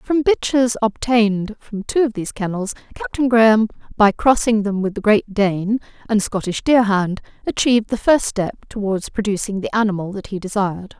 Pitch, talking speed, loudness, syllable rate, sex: 215 Hz, 170 wpm, -19 LUFS, 5.1 syllables/s, female